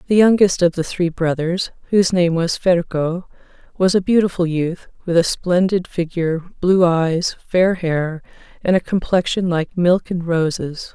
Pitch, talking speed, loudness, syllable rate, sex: 175 Hz, 160 wpm, -18 LUFS, 4.4 syllables/s, female